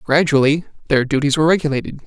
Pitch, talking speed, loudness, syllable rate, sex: 145 Hz, 145 wpm, -17 LUFS, 7.1 syllables/s, male